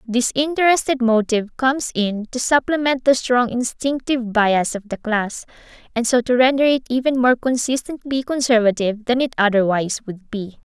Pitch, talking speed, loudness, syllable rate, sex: 240 Hz, 155 wpm, -19 LUFS, 5.2 syllables/s, female